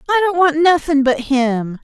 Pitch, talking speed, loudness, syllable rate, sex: 300 Hz, 195 wpm, -15 LUFS, 4.6 syllables/s, female